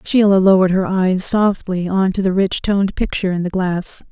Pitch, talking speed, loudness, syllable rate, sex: 190 Hz, 205 wpm, -16 LUFS, 5.3 syllables/s, female